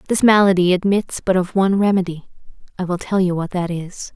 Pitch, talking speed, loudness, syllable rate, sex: 185 Hz, 200 wpm, -18 LUFS, 5.9 syllables/s, female